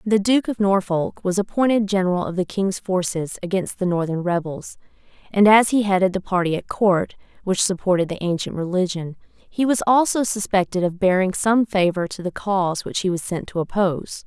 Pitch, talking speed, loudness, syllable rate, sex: 190 Hz, 190 wpm, -21 LUFS, 5.3 syllables/s, female